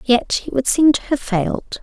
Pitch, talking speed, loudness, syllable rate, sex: 260 Hz, 230 wpm, -18 LUFS, 4.8 syllables/s, female